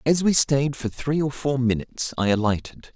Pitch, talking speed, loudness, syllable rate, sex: 135 Hz, 205 wpm, -23 LUFS, 5.0 syllables/s, male